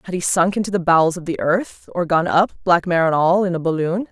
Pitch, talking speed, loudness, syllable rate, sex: 175 Hz, 275 wpm, -18 LUFS, 5.8 syllables/s, female